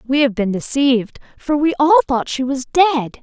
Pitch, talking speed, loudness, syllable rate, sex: 260 Hz, 205 wpm, -16 LUFS, 5.3 syllables/s, female